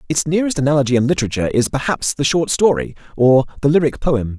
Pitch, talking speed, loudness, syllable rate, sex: 140 Hz, 190 wpm, -17 LUFS, 6.8 syllables/s, male